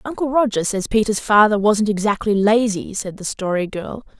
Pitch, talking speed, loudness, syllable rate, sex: 210 Hz, 170 wpm, -18 LUFS, 5.0 syllables/s, female